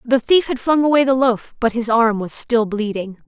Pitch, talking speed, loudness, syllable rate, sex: 240 Hz, 240 wpm, -17 LUFS, 4.8 syllables/s, female